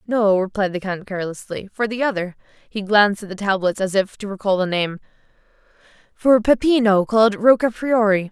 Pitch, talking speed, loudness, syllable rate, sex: 205 Hz, 175 wpm, -19 LUFS, 3.9 syllables/s, female